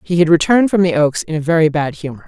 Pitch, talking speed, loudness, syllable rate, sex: 165 Hz, 290 wpm, -14 LUFS, 6.9 syllables/s, female